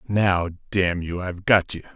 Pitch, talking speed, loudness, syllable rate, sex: 90 Hz, 185 wpm, -22 LUFS, 4.8 syllables/s, male